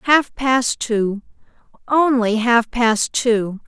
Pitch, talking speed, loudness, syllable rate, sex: 235 Hz, 100 wpm, -18 LUFS, 2.8 syllables/s, female